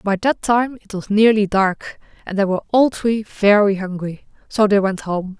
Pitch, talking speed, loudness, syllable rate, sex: 205 Hz, 200 wpm, -18 LUFS, 4.6 syllables/s, female